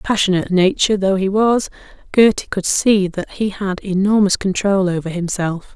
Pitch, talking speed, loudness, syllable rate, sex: 195 Hz, 155 wpm, -17 LUFS, 5.0 syllables/s, female